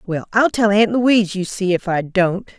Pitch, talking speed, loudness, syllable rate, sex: 195 Hz, 230 wpm, -17 LUFS, 4.7 syllables/s, female